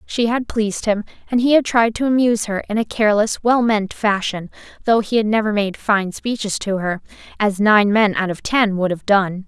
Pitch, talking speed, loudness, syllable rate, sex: 215 Hz, 220 wpm, -18 LUFS, 5.2 syllables/s, female